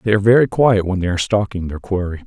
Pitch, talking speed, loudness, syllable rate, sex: 100 Hz, 265 wpm, -17 LUFS, 7.0 syllables/s, male